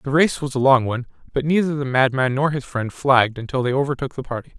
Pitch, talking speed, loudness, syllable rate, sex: 135 Hz, 250 wpm, -20 LUFS, 6.4 syllables/s, male